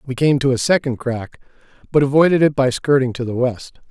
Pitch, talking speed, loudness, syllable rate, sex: 130 Hz, 215 wpm, -17 LUFS, 5.8 syllables/s, male